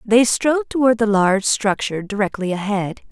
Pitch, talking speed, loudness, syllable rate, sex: 215 Hz, 155 wpm, -18 LUFS, 5.5 syllables/s, female